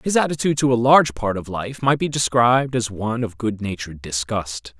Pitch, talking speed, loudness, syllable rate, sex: 120 Hz, 200 wpm, -20 LUFS, 5.8 syllables/s, male